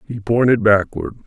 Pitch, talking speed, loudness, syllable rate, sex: 105 Hz, 140 wpm, -16 LUFS, 5.0 syllables/s, male